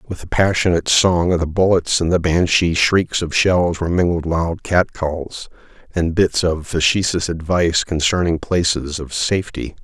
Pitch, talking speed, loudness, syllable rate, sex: 85 Hz, 160 wpm, -17 LUFS, 4.7 syllables/s, male